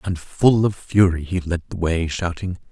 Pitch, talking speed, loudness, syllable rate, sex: 90 Hz, 200 wpm, -20 LUFS, 4.5 syllables/s, male